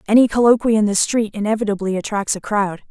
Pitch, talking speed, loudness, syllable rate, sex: 210 Hz, 185 wpm, -18 LUFS, 6.3 syllables/s, female